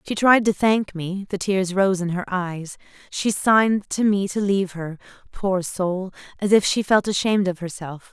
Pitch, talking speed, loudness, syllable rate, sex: 190 Hz, 190 wpm, -21 LUFS, 4.6 syllables/s, female